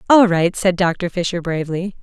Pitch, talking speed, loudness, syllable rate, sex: 180 Hz, 180 wpm, -18 LUFS, 5.1 syllables/s, female